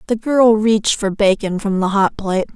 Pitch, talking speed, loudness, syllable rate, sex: 210 Hz, 210 wpm, -16 LUFS, 5.2 syllables/s, female